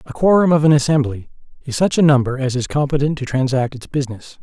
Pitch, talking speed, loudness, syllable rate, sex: 140 Hz, 215 wpm, -17 LUFS, 6.3 syllables/s, male